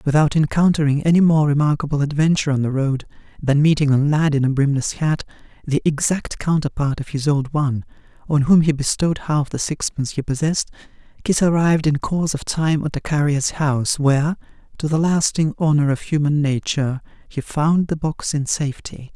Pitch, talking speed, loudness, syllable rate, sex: 150 Hz, 180 wpm, -19 LUFS, 5.6 syllables/s, male